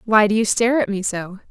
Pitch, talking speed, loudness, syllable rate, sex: 215 Hz, 280 wpm, -19 LUFS, 6.2 syllables/s, female